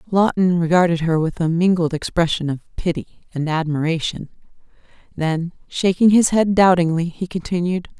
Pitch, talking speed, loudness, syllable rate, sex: 170 Hz, 135 wpm, -19 LUFS, 5.1 syllables/s, female